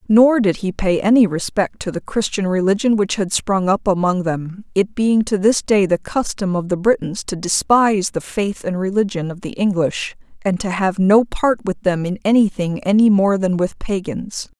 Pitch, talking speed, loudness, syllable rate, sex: 195 Hz, 200 wpm, -18 LUFS, 4.8 syllables/s, female